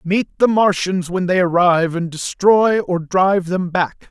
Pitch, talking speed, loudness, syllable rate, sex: 180 Hz, 175 wpm, -16 LUFS, 4.2 syllables/s, male